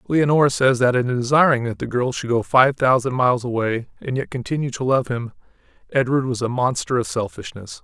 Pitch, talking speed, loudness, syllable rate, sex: 125 Hz, 200 wpm, -20 LUFS, 5.6 syllables/s, male